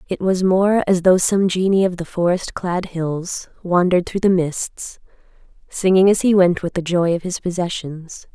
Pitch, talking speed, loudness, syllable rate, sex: 180 Hz, 185 wpm, -18 LUFS, 4.5 syllables/s, female